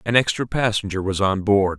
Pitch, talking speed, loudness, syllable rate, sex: 105 Hz, 200 wpm, -20 LUFS, 5.2 syllables/s, male